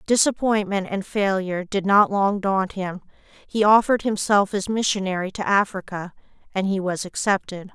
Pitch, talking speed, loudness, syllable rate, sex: 195 Hz, 140 wpm, -22 LUFS, 4.9 syllables/s, female